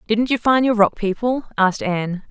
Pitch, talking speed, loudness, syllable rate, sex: 220 Hz, 210 wpm, -19 LUFS, 5.5 syllables/s, female